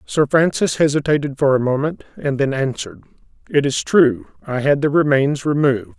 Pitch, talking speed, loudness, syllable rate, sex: 140 Hz, 170 wpm, -18 LUFS, 5.4 syllables/s, male